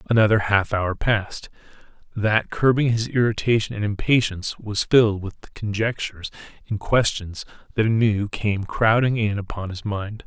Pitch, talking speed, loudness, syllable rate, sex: 105 Hz, 145 wpm, -22 LUFS, 5.0 syllables/s, male